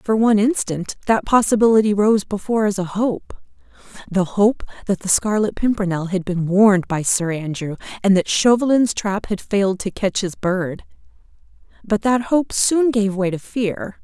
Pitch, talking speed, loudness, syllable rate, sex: 205 Hz, 165 wpm, -19 LUFS, 4.8 syllables/s, female